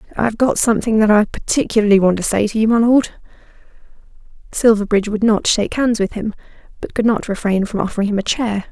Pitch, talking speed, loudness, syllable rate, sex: 215 Hz, 200 wpm, -16 LUFS, 6.6 syllables/s, female